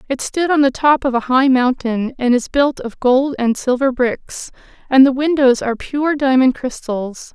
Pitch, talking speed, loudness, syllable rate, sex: 265 Hz, 195 wpm, -16 LUFS, 4.5 syllables/s, female